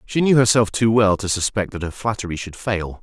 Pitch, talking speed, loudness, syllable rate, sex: 105 Hz, 240 wpm, -19 LUFS, 5.5 syllables/s, male